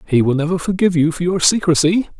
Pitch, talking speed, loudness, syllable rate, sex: 170 Hz, 220 wpm, -16 LUFS, 6.8 syllables/s, male